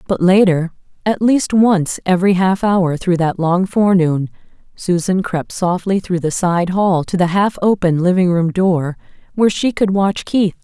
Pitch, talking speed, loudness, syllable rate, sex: 185 Hz, 175 wpm, -15 LUFS, 4.5 syllables/s, female